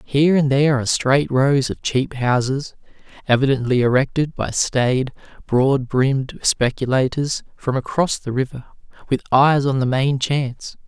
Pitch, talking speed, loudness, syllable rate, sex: 135 Hz, 145 wpm, -19 LUFS, 4.6 syllables/s, male